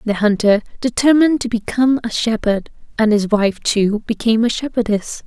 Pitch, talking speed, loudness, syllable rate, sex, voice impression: 225 Hz, 160 wpm, -16 LUFS, 5.4 syllables/s, female, feminine, adult-like, slightly cute, slightly calm, slightly friendly, reassuring, slightly kind